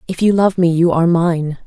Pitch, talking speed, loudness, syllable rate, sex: 170 Hz, 250 wpm, -14 LUFS, 5.5 syllables/s, female